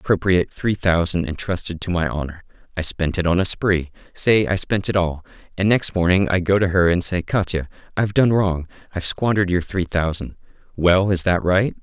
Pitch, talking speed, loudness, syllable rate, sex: 90 Hz, 210 wpm, -20 LUFS, 5.6 syllables/s, male